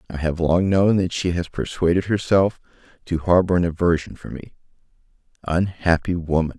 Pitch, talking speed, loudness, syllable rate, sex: 85 Hz, 155 wpm, -20 LUFS, 5.1 syllables/s, male